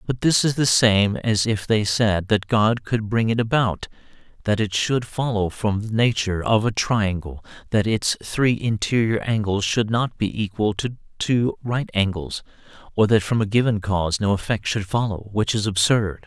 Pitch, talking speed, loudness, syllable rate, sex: 105 Hz, 190 wpm, -21 LUFS, 4.6 syllables/s, male